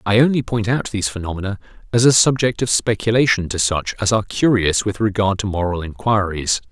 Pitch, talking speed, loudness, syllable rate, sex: 105 Hz, 190 wpm, -18 LUFS, 5.8 syllables/s, male